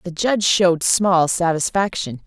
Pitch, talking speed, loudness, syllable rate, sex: 180 Hz, 130 wpm, -18 LUFS, 4.7 syllables/s, female